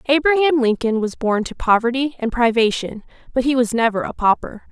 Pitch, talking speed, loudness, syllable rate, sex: 245 Hz, 180 wpm, -18 LUFS, 5.5 syllables/s, female